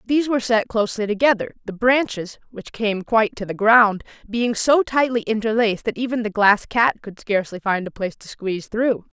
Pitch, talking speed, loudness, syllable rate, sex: 220 Hz, 195 wpm, -20 LUFS, 5.5 syllables/s, female